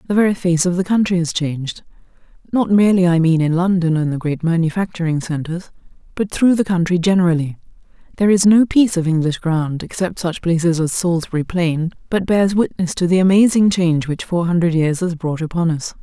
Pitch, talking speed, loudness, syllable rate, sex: 175 Hz, 195 wpm, -17 LUFS, 5.9 syllables/s, female